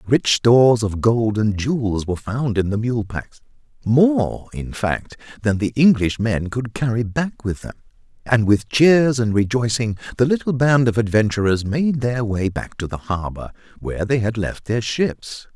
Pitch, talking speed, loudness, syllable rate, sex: 115 Hz, 175 wpm, -19 LUFS, 4.5 syllables/s, male